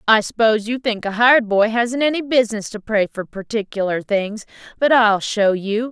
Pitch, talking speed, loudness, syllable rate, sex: 220 Hz, 195 wpm, -18 LUFS, 5.0 syllables/s, female